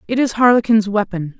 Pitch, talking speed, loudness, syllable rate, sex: 215 Hz, 175 wpm, -15 LUFS, 5.7 syllables/s, female